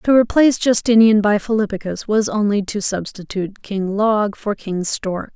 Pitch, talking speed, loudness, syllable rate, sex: 210 Hz, 155 wpm, -18 LUFS, 4.8 syllables/s, female